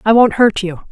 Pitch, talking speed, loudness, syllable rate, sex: 215 Hz, 260 wpm, -13 LUFS, 4.9 syllables/s, female